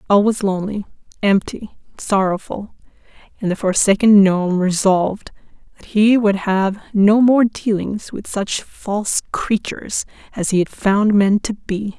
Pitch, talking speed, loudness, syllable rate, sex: 200 Hz, 140 wpm, -17 LUFS, 4.4 syllables/s, female